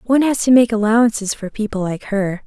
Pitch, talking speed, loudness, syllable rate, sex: 220 Hz, 220 wpm, -17 LUFS, 5.9 syllables/s, female